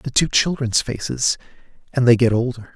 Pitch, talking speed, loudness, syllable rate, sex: 120 Hz, 175 wpm, -19 LUFS, 5.1 syllables/s, male